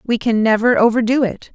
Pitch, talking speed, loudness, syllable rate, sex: 230 Hz, 195 wpm, -15 LUFS, 5.6 syllables/s, female